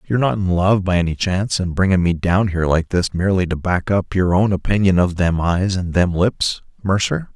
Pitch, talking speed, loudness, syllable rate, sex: 90 Hz, 230 wpm, -18 LUFS, 5.4 syllables/s, male